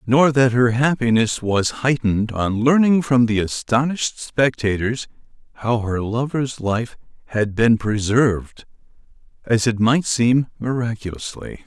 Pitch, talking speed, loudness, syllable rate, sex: 120 Hz, 120 wpm, -19 LUFS, 4.2 syllables/s, male